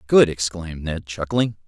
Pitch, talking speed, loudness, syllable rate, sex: 95 Hz, 145 wpm, -22 LUFS, 4.9 syllables/s, male